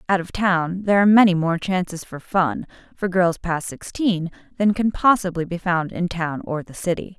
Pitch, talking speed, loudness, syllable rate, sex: 180 Hz, 200 wpm, -21 LUFS, 5.0 syllables/s, female